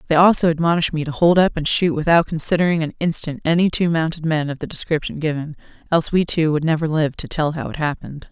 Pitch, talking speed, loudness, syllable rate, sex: 160 Hz, 230 wpm, -19 LUFS, 6.5 syllables/s, female